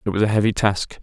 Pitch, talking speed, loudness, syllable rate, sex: 105 Hz, 295 wpm, -19 LUFS, 7.0 syllables/s, male